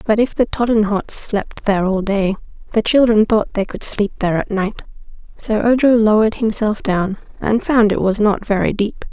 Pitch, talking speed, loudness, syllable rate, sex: 210 Hz, 190 wpm, -17 LUFS, 5.0 syllables/s, female